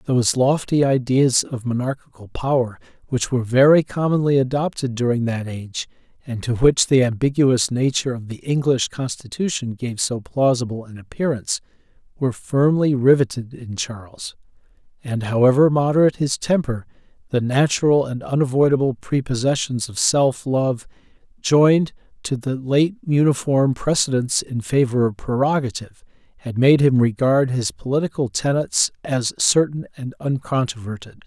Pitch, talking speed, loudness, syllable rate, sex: 130 Hz, 130 wpm, -20 LUFS, 5.0 syllables/s, male